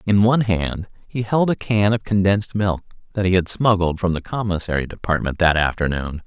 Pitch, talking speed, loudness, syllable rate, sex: 95 Hz, 190 wpm, -20 LUFS, 5.5 syllables/s, male